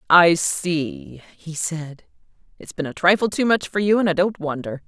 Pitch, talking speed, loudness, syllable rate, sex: 175 Hz, 195 wpm, -20 LUFS, 4.4 syllables/s, female